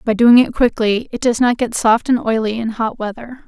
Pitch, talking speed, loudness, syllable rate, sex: 230 Hz, 240 wpm, -16 LUFS, 4.8 syllables/s, female